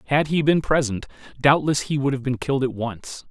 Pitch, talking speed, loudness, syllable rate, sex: 135 Hz, 220 wpm, -22 LUFS, 5.5 syllables/s, male